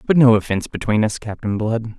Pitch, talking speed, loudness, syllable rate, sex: 110 Hz, 210 wpm, -19 LUFS, 5.9 syllables/s, male